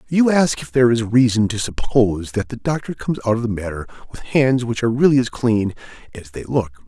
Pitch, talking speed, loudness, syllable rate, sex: 120 Hz, 225 wpm, -19 LUFS, 6.0 syllables/s, male